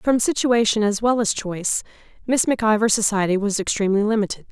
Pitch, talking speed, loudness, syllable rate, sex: 215 Hz, 175 wpm, -20 LUFS, 6.0 syllables/s, female